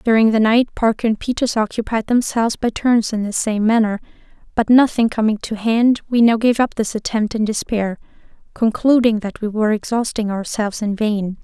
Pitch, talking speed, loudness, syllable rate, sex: 220 Hz, 185 wpm, -18 LUFS, 5.3 syllables/s, female